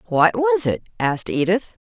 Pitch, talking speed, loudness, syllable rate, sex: 190 Hz, 160 wpm, -20 LUFS, 5.0 syllables/s, female